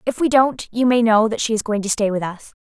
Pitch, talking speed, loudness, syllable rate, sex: 225 Hz, 320 wpm, -18 LUFS, 5.8 syllables/s, female